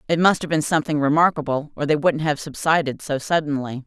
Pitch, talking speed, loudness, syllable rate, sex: 150 Hz, 200 wpm, -21 LUFS, 6.0 syllables/s, female